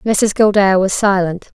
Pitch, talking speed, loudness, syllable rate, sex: 195 Hz, 150 wpm, -14 LUFS, 4.3 syllables/s, female